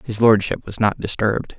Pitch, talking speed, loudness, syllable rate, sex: 105 Hz, 190 wpm, -19 LUFS, 5.4 syllables/s, male